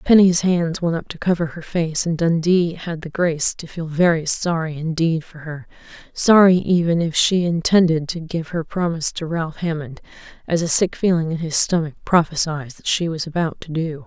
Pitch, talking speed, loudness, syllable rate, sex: 165 Hz, 190 wpm, -19 LUFS, 5.0 syllables/s, female